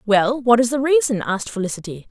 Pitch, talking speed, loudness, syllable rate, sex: 230 Hz, 200 wpm, -18 LUFS, 6.1 syllables/s, female